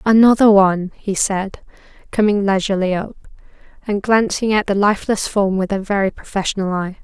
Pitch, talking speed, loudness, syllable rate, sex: 200 Hz, 155 wpm, -17 LUFS, 5.6 syllables/s, female